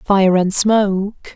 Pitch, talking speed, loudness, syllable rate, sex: 195 Hz, 135 wpm, -15 LUFS, 3.1 syllables/s, female